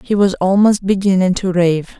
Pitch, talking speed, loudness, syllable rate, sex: 190 Hz, 180 wpm, -14 LUFS, 5.1 syllables/s, female